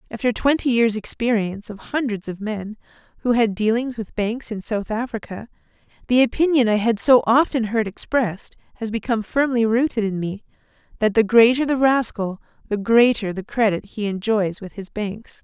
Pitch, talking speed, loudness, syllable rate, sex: 225 Hz, 170 wpm, -20 LUFS, 5.1 syllables/s, female